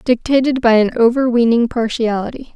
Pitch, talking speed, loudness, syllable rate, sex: 235 Hz, 115 wpm, -15 LUFS, 5.4 syllables/s, female